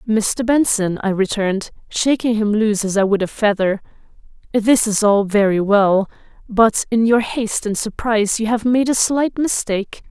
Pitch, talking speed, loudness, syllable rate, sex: 215 Hz, 170 wpm, -17 LUFS, 4.8 syllables/s, female